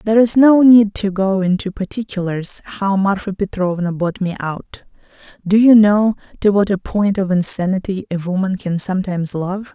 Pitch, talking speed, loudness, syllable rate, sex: 195 Hz, 165 wpm, -16 LUFS, 4.9 syllables/s, female